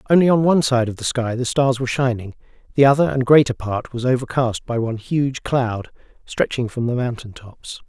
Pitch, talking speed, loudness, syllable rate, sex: 125 Hz, 200 wpm, -19 LUFS, 5.6 syllables/s, male